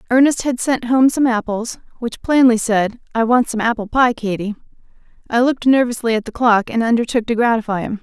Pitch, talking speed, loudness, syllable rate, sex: 235 Hz, 195 wpm, -17 LUFS, 5.6 syllables/s, female